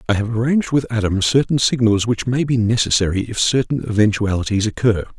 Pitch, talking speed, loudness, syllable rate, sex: 115 Hz, 175 wpm, -18 LUFS, 6.0 syllables/s, male